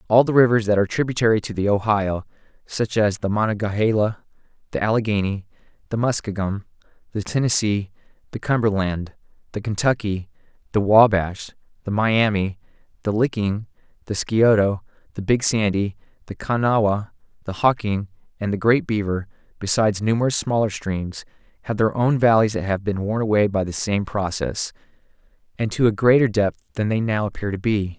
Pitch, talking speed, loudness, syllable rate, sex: 105 Hz, 150 wpm, -21 LUFS, 5.4 syllables/s, male